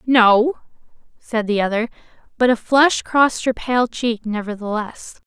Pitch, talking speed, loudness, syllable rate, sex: 235 Hz, 135 wpm, -18 LUFS, 4.3 syllables/s, female